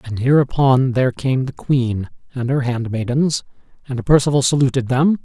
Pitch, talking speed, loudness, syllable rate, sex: 130 Hz, 150 wpm, -18 LUFS, 5.0 syllables/s, male